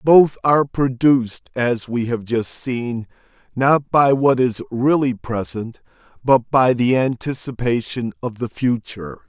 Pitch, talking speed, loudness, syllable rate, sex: 125 Hz, 135 wpm, -19 LUFS, 4.0 syllables/s, male